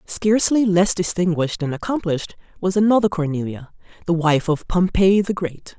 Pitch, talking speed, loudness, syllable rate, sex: 180 Hz, 145 wpm, -19 LUFS, 5.3 syllables/s, female